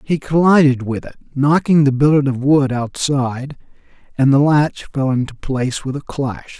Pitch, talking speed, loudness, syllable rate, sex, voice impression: 140 Hz, 175 wpm, -16 LUFS, 4.7 syllables/s, male, very masculine, slightly adult-like, thick, tensed, slightly powerful, bright, soft, clear, fluent, slightly raspy, cool, very intellectual, refreshing, sincere, very calm, very mature, friendly, reassuring, unique, slightly elegant, wild, slightly sweet, slightly lively, very kind, very modest